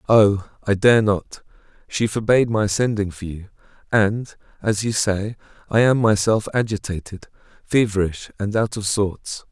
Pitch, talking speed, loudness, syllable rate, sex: 105 Hz, 140 wpm, -20 LUFS, 4.4 syllables/s, male